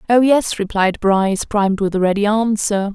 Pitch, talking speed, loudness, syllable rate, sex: 205 Hz, 185 wpm, -16 LUFS, 5.2 syllables/s, female